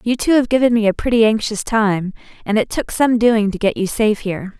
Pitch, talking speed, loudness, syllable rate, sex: 220 Hz, 250 wpm, -16 LUFS, 5.8 syllables/s, female